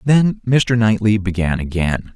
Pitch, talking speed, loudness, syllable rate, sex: 105 Hz, 140 wpm, -17 LUFS, 4.0 syllables/s, male